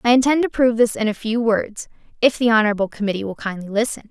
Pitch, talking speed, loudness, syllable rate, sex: 225 Hz, 235 wpm, -19 LUFS, 6.8 syllables/s, female